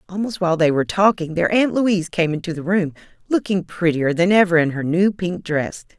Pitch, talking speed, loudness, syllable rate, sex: 180 Hz, 210 wpm, -19 LUFS, 5.7 syllables/s, female